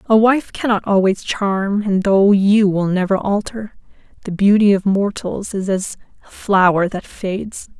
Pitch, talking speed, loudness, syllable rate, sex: 200 Hz, 160 wpm, -16 LUFS, 4.2 syllables/s, female